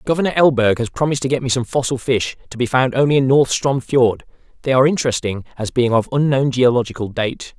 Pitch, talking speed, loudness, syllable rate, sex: 130 Hz, 215 wpm, -17 LUFS, 6.2 syllables/s, male